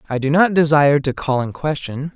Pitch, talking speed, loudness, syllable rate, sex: 145 Hz, 225 wpm, -17 LUFS, 5.6 syllables/s, male